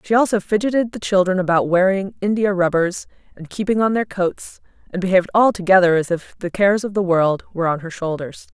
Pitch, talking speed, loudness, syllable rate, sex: 190 Hz, 195 wpm, -18 LUFS, 5.9 syllables/s, female